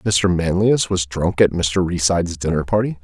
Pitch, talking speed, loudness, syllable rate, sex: 90 Hz, 180 wpm, -18 LUFS, 4.7 syllables/s, male